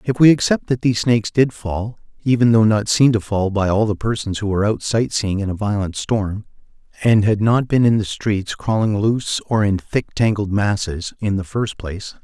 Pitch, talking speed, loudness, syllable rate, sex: 105 Hz, 220 wpm, -18 LUFS, 5.1 syllables/s, male